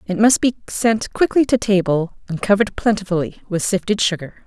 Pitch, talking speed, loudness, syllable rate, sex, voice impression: 205 Hz, 175 wpm, -18 LUFS, 5.5 syllables/s, female, very feminine, adult-like, slightly middle-aged, very thin, slightly relaxed, slightly weak, slightly dark, hard, clear, fluent, slightly raspy, slightly cute, slightly cool, intellectual, very refreshing, slightly sincere, calm, friendly, reassuring, very unique, elegant, sweet, slightly lively, kind